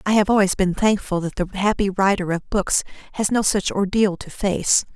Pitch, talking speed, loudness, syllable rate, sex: 195 Hz, 205 wpm, -20 LUFS, 5.1 syllables/s, female